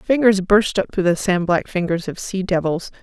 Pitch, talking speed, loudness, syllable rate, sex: 185 Hz, 220 wpm, -19 LUFS, 5.0 syllables/s, female